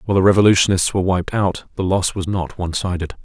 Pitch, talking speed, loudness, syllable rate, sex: 95 Hz, 220 wpm, -18 LUFS, 6.8 syllables/s, male